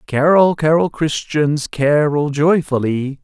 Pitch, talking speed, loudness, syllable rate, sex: 150 Hz, 95 wpm, -16 LUFS, 3.6 syllables/s, male